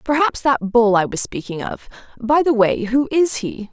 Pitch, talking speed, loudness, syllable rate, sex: 245 Hz, 210 wpm, -18 LUFS, 4.7 syllables/s, female